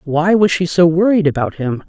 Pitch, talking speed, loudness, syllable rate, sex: 170 Hz, 225 wpm, -14 LUFS, 5.1 syllables/s, female